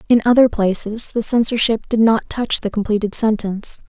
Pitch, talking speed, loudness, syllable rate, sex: 220 Hz, 170 wpm, -17 LUFS, 5.3 syllables/s, female